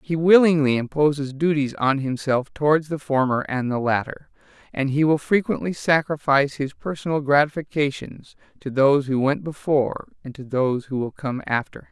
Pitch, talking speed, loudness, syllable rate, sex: 145 Hz, 165 wpm, -21 LUFS, 5.3 syllables/s, male